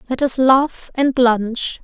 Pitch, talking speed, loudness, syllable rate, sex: 255 Hz, 165 wpm, -16 LUFS, 3.2 syllables/s, female